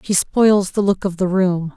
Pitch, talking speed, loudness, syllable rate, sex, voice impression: 190 Hz, 240 wpm, -17 LUFS, 4.2 syllables/s, female, feminine, adult-like, slightly calm, elegant